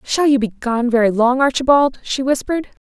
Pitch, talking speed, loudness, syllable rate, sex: 255 Hz, 190 wpm, -16 LUFS, 5.4 syllables/s, female